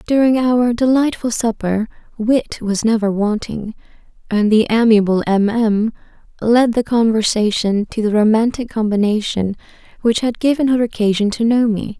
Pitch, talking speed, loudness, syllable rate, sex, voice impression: 225 Hz, 140 wpm, -16 LUFS, 4.7 syllables/s, female, feminine, slightly adult-like, slightly clear, slightly cute, slightly refreshing, sincere, friendly